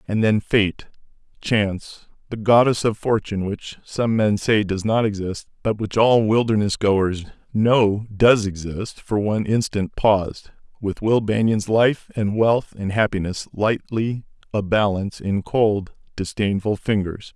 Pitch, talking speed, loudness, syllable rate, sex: 105 Hz, 145 wpm, -21 LUFS, 4.2 syllables/s, male